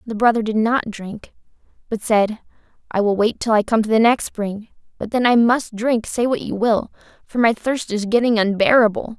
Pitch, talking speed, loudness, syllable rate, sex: 220 Hz, 210 wpm, -18 LUFS, 5.0 syllables/s, female